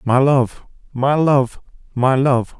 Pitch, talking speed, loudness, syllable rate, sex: 130 Hz, 140 wpm, -17 LUFS, 3.1 syllables/s, male